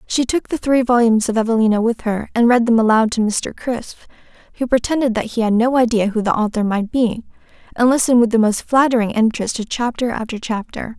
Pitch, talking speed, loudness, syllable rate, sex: 230 Hz, 215 wpm, -17 LUFS, 6.0 syllables/s, female